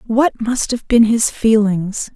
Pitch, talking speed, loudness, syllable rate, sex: 225 Hz, 165 wpm, -15 LUFS, 3.5 syllables/s, female